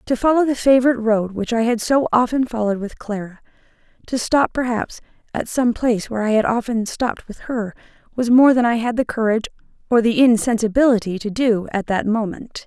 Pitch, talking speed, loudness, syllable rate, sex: 230 Hz, 195 wpm, -18 LUFS, 5.8 syllables/s, female